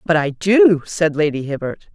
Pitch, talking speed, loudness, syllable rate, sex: 155 Hz, 185 wpm, -17 LUFS, 4.6 syllables/s, female